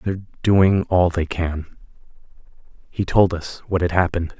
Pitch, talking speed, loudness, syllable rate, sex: 90 Hz, 150 wpm, -20 LUFS, 4.5 syllables/s, male